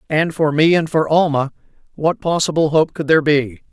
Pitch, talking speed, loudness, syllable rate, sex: 155 Hz, 195 wpm, -16 LUFS, 5.3 syllables/s, male